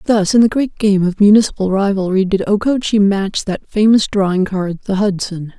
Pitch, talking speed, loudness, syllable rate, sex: 200 Hz, 185 wpm, -15 LUFS, 5.2 syllables/s, female